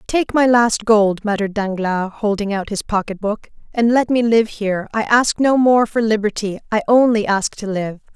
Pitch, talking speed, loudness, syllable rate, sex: 215 Hz, 190 wpm, -17 LUFS, 4.8 syllables/s, female